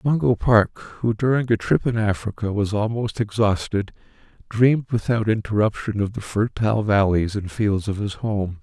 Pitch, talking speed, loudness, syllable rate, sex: 105 Hz, 160 wpm, -21 LUFS, 4.9 syllables/s, male